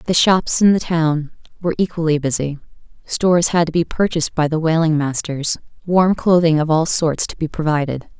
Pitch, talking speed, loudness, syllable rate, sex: 160 Hz, 185 wpm, -17 LUFS, 5.3 syllables/s, female